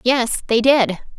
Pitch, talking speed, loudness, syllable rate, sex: 240 Hz, 150 wpm, -17 LUFS, 3.5 syllables/s, female